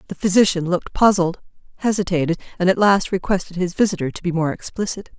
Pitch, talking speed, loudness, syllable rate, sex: 185 Hz, 175 wpm, -19 LUFS, 6.5 syllables/s, female